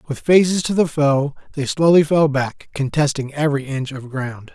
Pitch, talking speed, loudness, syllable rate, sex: 145 Hz, 185 wpm, -18 LUFS, 4.9 syllables/s, male